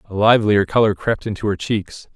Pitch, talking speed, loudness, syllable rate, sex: 105 Hz, 195 wpm, -18 LUFS, 5.5 syllables/s, male